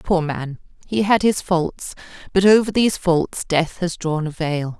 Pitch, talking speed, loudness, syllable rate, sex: 175 Hz, 190 wpm, -19 LUFS, 4.2 syllables/s, female